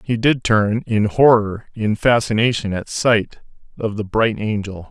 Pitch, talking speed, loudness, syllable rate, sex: 110 Hz, 160 wpm, -18 LUFS, 4.2 syllables/s, male